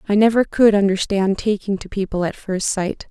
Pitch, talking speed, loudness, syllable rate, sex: 200 Hz, 195 wpm, -19 LUFS, 5.1 syllables/s, female